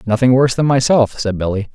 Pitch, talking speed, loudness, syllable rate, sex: 120 Hz, 205 wpm, -15 LUFS, 6.3 syllables/s, male